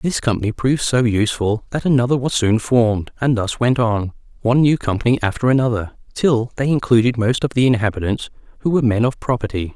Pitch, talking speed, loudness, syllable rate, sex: 120 Hz, 190 wpm, -18 LUFS, 6.1 syllables/s, male